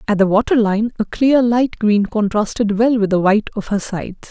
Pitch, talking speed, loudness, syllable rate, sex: 215 Hz, 210 wpm, -16 LUFS, 5.5 syllables/s, female